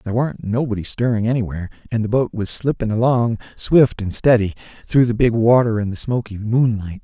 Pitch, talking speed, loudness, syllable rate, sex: 115 Hz, 190 wpm, -18 LUFS, 5.6 syllables/s, male